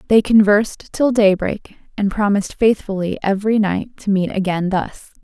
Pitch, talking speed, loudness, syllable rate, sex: 205 Hz, 150 wpm, -17 LUFS, 4.9 syllables/s, female